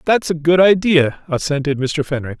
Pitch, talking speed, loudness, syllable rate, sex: 155 Hz, 175 wpm, -16 LUFS, 5.0 syllables/s, male